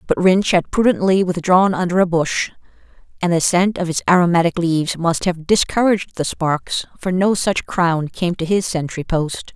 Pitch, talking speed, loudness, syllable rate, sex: 175 Hz, 180 wpm, -17 LUFS, 4.8 syllables/s, female